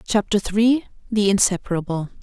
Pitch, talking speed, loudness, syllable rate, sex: 205 Hz, 80 wpm, -20 LUFS, 5.2 syllables/s, female